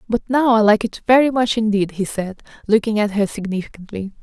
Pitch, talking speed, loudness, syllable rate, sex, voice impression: 215 Hz, 200 wpm, -18 LUFS, 5.8 syllables/s, female, feminine, adult-like, slightly tensed, powerful, bright, soft, fluent, slightly raspy, calm, friendly, reassuring, elegant, lively, kind